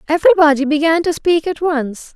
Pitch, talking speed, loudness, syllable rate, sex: 320 Hz, 165 wpm, -14 LUFS, 5.6 syllables/s, female